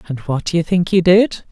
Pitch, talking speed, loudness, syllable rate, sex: 170 Hz, 275 wpm, -15 LUFS, 5.3 syllables/s, male